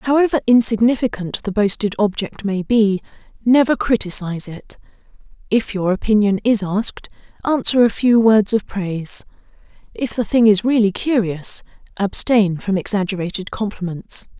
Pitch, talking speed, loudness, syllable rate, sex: 210 Hz, 130 wpm, -18 LUFS, 4.9 syllables/s, female